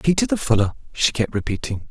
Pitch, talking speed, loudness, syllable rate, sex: 115 Hz, 190 wpm, -21 LUFS, 6.0 syllables/s, male